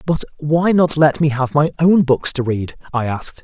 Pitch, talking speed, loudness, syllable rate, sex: 145 Hz, 225 wpm, -16 LUFS, 4.9 syllables/s, male